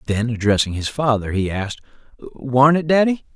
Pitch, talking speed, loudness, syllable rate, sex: 125 Hz, 160 wpm, -18 LUFS, 5.3 syllables/s, male